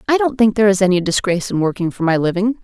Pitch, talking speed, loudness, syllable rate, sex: 200 Hz, 275 wpm, -16 LUFS, 7.4 syllables/s, female